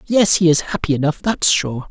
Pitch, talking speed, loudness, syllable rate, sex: 165 Hz, 220 wpm, -16 LUFS, 5.1 syllables/s, male